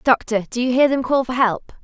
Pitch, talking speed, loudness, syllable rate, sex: 245 Hz, 260 wpm, -19 LUFS, 5.3 syllables/s, female